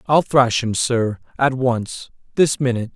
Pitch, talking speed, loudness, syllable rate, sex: 125 Hz, 140 wpm, -19 LUFS, 4.2 syllables/s, male